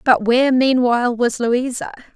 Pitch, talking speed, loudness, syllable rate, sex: 245 Hz, 140 wpm, -17 LUFS, 4.8 syllables/s, female